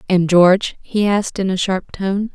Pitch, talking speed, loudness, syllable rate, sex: 190 Hz, 205 wpm, -17 LUFS, 4.7 syllables/s, female